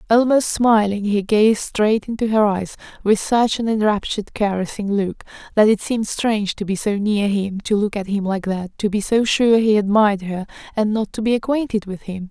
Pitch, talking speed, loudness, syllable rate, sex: 210 Hz, 210 wpm, -19 LUFS, 5.2 syllables/s, female